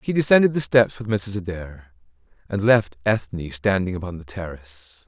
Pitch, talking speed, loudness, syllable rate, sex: 95 Hz, 165 wpm, -21 LUFS, 5.1 syllables/s, male